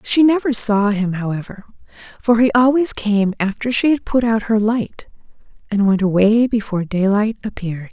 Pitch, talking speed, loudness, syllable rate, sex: 215 Hz, 165 wpm, -17 LUFS, 5.0 syllables/s, female